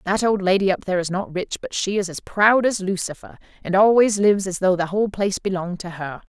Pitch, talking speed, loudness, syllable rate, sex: 190 Hz, 245 wpm, -20 LUFS, 6.2 syllables/s, female